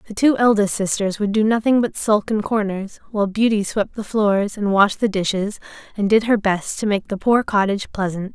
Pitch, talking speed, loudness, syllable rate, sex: 205 Hz, 215 wpm, -19 LUFS, 5.2 syllables/s, female